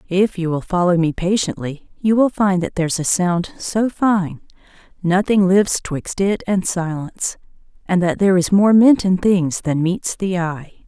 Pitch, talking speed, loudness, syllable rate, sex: 185 Hz, 180 wpm, -18 LUFS, 4.5 syllables/s, female